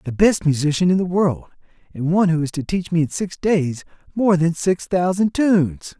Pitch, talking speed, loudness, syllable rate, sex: 175 Hz, 210 wpm, -19 LUFS, 5.1 syllables/s, male